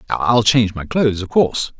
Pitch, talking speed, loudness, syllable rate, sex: 110 Hz, 200 wpm, -16 LUFS, 5.7 syllables/s, male